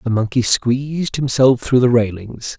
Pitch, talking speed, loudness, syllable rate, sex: 125 Hz, 165 wpm, -16 LUFS, 4.4 syllables/s, male